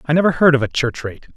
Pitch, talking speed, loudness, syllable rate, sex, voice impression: 145 Hz, 310 wpm, -16 LUFS, 6.7 syllables/s, male, masculine, adult-like, fluent, refreshing, sincere, slightly friendly